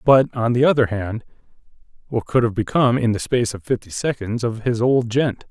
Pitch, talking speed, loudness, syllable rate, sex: 115 Hz, 185 wpm, -20 LUFS, 5.5 syllables/s, male